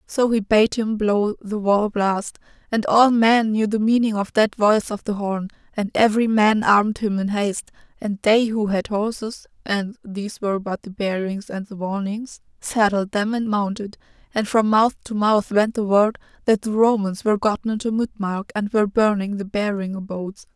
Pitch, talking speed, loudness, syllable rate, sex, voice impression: 210 Hz, 195 wpm, -21 LUFS, 4.3 syllables/s, female, feminine, slightly adult-like, slightly cute, intellectual, slightly sweet